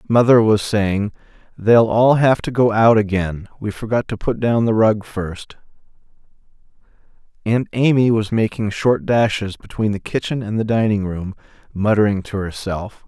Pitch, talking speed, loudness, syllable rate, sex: 105 Hz, 155 wpm, -18 LUFS, 4.6 syllables/s, male